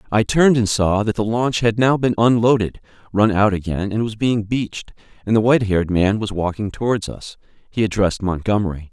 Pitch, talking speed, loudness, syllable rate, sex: 105 Hz, 200 wpm, -18 LUFS, 5.8 syllables/s, male